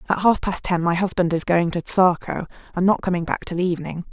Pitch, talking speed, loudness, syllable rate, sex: 175 Hz, 235 wpm, -21 LUFS, 5.8 syllables/s, female